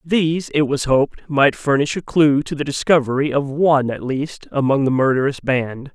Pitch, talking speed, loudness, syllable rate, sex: 140 Hz, 190 wpm, -18 LUFS, 5.0 syllables/s, male